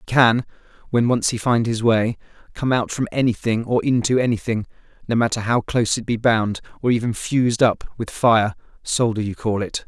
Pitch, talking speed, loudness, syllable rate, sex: 115 Hz, 190 wpm, -20 LUFS, 5.4 syllables/s, male